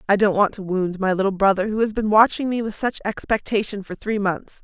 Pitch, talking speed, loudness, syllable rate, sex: 205 Hz, 245 wpm, -21 LUFS, 5.7 syllables/s, female